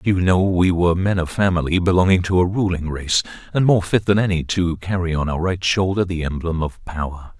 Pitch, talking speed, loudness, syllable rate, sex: 90 Hz, 220 wpm, -19 LUFS, 5.5 syllables/s, male